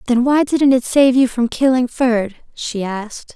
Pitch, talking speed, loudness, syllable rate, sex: 245 Hz, 195 wpm, -16 LUFS, 4.2 syllables/s, female